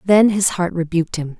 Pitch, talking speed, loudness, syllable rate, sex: 180 Hz, 215 wpm, -18 LUFS, 5.4 syllables/s, female